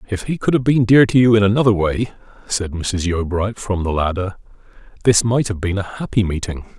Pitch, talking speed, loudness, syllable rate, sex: 105 Hz, 210 wpm, -18 LUFS, 5.4 syllables/s, male